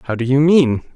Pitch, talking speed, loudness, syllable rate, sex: 135 Hz, 250 wpm, -14 LUFS, 4.9 syllables/s, male